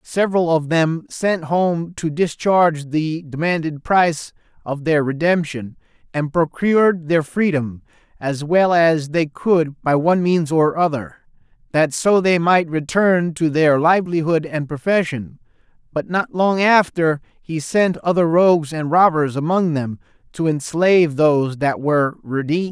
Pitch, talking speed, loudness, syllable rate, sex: 160 Hz, 145 wpm, -18 LUFS, 4.3 syllables/s, male